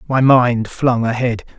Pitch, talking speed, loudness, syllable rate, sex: 120 Hz, 150 wpm, -15 LUFS, 3.9 syllables/s, male